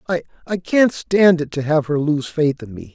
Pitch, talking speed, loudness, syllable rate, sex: 160 Hz, 225 wpm, -18 LUFS, 4.8 syllables/s, male